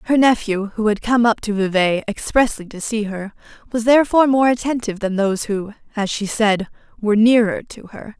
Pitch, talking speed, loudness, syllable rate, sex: 220 Hz, 190 wpm, -18 LUFS, 5.6 syllables/s, female